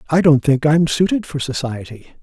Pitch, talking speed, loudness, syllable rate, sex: 145 Hz, 190 wpm, -17 LUFS, 5.4 syllables/s, male